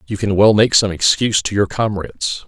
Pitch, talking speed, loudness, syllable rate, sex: 100 Hz, 220 wpm, -15 LUFS, 5.7 syllables/s, male